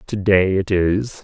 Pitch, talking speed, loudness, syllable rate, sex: 95 Hz, 145 wpm, -17 LUFS, 3.6 syllables/s, male